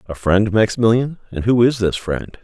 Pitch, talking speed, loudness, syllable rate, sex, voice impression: 105 Hz, 195 wpm, -17 LUFS, 5.1 syllables/s, male, masculine, adult-like, slightly thick, cool, intellectual, slightly calm